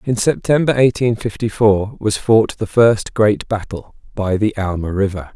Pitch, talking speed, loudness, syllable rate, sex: 105 Hz, 170 wpm, -16 LUFS, 4.4 syllables/s, male